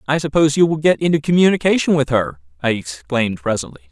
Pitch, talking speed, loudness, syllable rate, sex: 140 Hz, 185 wpm, -17 LUFS, 6.7 syllables/s, male